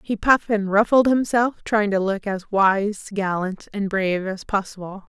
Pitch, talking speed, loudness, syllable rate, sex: 205 Hz, 175 wpm, -21 LUFS, 4.6 syllables/s, female